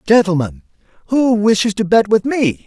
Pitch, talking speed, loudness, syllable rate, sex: 205 Hz, 160 wpm, -15 LUFS, 4.8 syllables/s, male